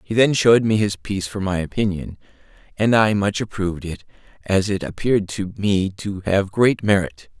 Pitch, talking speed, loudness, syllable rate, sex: 100 Hz, 185 wpm, -20 LUFS, 4.7 syllables/s, male